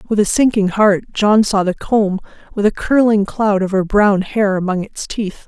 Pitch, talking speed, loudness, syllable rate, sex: 205 Hz, 210 wpm, -15 LUFS, 4.5 syllables/s, female